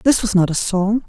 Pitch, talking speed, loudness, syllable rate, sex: 205 Hz, 280 wpm, -17 LUFS, 5.2 syllables/s, female